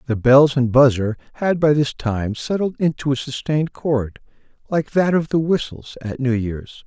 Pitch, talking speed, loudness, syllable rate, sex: 135 Hz, 185 wpm, -19 LUFS, 4.6 syllables/s, male